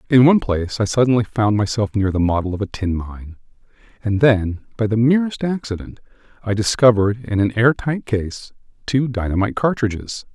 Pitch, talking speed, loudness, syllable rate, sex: 110 Hz, 175 wpm, -19 LUFS, 5.5 syllables/s, male